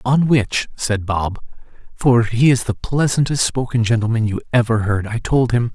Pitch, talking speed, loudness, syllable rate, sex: 120 Hz, 175 wpm, -18 LUFS, 4.7 syllables/s, male